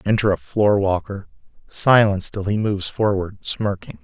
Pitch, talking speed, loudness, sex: 100 Hz, 135 wpm, -20 LUFS, male